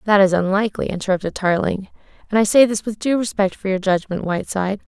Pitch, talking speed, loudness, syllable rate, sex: 200 Hz, 195 wpm, -19 LUFS, 6.5 syllables/s, female